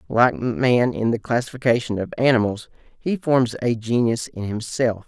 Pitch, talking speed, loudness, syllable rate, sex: 120 Hz, 155 wpm, -21 LUFS, 4.6 syllables/s, male